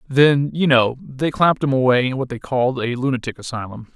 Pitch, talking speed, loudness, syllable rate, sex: 130 Hz, 210 wpm, -19 LUFS, 5.7 syllables/s, male